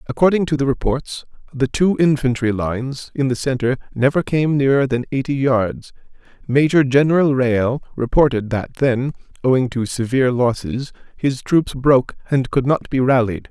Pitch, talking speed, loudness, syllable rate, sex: 130 Hz, 155 wpm, -18 LUFS, 4.9 syllables/s, male